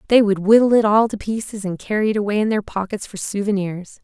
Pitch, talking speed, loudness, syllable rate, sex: 205 Hz, 240 wpm, -19 LUFS, 6.0 syllables/s, female